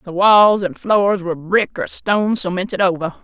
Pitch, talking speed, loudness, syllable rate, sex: 190 Hz, 185 wpm, -16 LUFS, 4.9 syllables/s, female